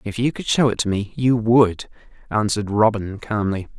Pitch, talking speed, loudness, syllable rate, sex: 110 Hz, 190 wpm, -20 LUFS, 5.0 syllables/s, male